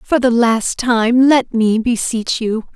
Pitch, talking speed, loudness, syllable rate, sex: 235 Hz, 175 wpm, -15 LUFS, 3.4 syllables/s, female